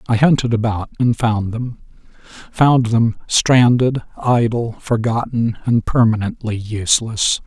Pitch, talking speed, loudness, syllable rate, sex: 115 Hz, 105 wpm, -17 LUFS, 4.0 syllables/s, male